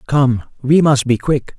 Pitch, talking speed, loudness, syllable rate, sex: 130 Hz, 190 wpm, -15 LUFS, 4.1 syllables/s, male